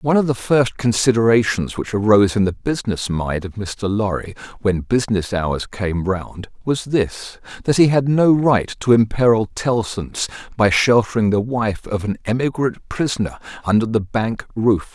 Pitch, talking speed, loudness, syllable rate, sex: 110 Hz, 160 wpm, -19 LUFS, 4.7 syllables/s, male